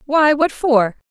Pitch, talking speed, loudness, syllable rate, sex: 275 Hz, 165 wpm, -16 LUFS, 3.5 syllables/s, female